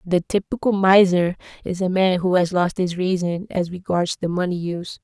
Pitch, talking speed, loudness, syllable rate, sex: 185 Hz, 190 wpm, -20 LUFS, 5.0 syllables/s, female